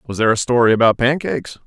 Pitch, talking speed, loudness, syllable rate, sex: 120 Hz, 215 wpm, -16 LUFS, 6.9 syllables/s, male